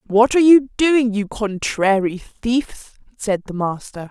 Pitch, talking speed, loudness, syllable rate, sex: 225 Hz, 145 wpm, -18 LUFS, 3.9 syllables/s, female